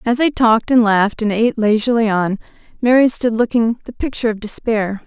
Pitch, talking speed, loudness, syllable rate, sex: 225 Hz, 190 wpm, -16 LUFS, 6.0 syllables/s, female